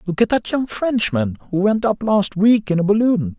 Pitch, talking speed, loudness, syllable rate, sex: 200 Hz, 230 wpm, -18 LUFS, 4.8 syllables/s, male